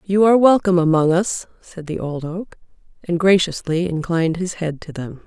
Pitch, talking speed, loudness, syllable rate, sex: 175 Hz, 180 wpm, -18 LUFS, 5.2 syllables/s, female